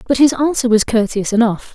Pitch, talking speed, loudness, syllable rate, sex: 235 Hz, 205 wpm, -15 LUFS, 5.7 syllables/s, female